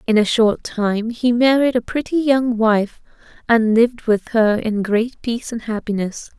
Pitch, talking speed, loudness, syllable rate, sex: 230 Hz, 180 wpm, -18 LUFS, 4.4 syllables/s, female